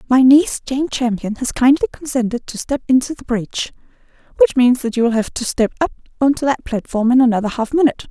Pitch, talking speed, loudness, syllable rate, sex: 250 Hz, 215 wpm, -17 LUFS, 6.1 syllables/s, female